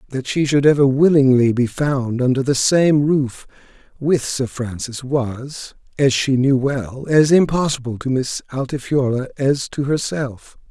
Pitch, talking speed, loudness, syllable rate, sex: 135 Hz, 150 wpm, -18 LUFS, 4.1 syllables/s, male